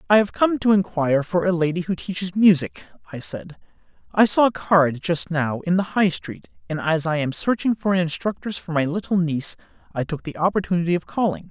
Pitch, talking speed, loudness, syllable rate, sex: 175 Hz, 215 wpm, -21 LUFS, 5.6 syllables/s, male